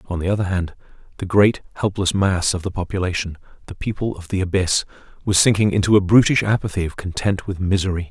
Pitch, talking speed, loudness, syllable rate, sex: 95 Hz, 190 wpm, -19 LUFS, 6.1 syllables/s, male